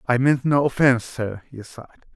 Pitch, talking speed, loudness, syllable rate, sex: 125 Hz, 195 wpm, -20 LUFS, 5.8 syllables/s, male